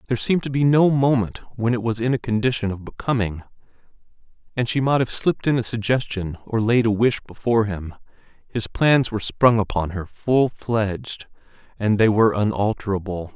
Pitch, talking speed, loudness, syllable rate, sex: 115 Hz, 180 wpm, -21 LUFS, 5.5 syllables/s, male